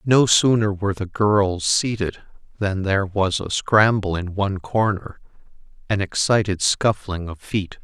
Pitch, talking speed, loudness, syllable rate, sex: 100 Hz, 145 wpm, -20 LUFS, 4.4 syllables/s, male